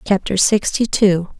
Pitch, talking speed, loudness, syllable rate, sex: 195 Hz, 130 wpm, -16 LUFS, 4.3 syllables/s, female